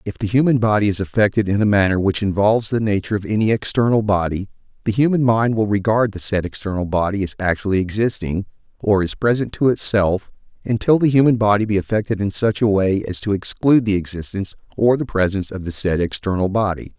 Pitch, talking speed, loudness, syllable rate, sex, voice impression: 105 Hz, 200 wpm, -19 LUFS, 6.2 syllables/s, male, masculine, very adult-like, slightly thick, slightly refreshing, sincere, slightly kind